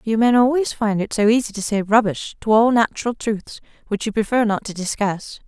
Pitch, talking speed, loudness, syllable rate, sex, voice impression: 220 Hz, 220 wpm, -19 LUFS, 5.4 syllables/s, female, feminine, adult-like, fluent, slightly refreshing, sincere, calm, slightly elegant